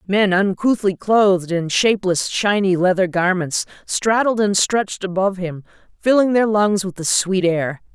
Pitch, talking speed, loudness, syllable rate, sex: 195 Hz, 150 wpm, -18 LUFS, 4.6 syllables/s, female